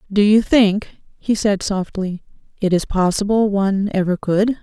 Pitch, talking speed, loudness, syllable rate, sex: 200 Hz, 155 wpm, -18 LUFS, 4.5 syllables/s, female